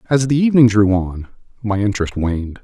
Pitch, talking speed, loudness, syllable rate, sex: 110 Hz, 180 wpm, -16 LUFS, 5.9 syllables/s, male